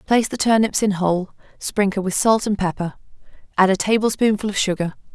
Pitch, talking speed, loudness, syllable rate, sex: 200 Hz, 175 wpm, -20 LUFS, 5.8 syllables/s, female